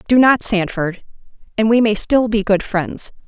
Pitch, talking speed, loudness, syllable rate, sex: 215 Hz, 185 wpm, -16 LUFS, 4.4 syllables/s, female